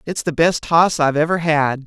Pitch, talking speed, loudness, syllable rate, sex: 155 Hz, 225 wpm, -17 LUFS, 5.1 syllables/s, male